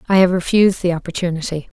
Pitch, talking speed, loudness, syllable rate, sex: 175 Hz, 170 wpm, -17 LUFS, 7.1 syllables/s, female